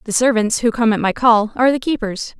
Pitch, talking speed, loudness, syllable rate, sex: 230 Hz, 250 wpm, -16 LUFS, 5.9 syllables/s, female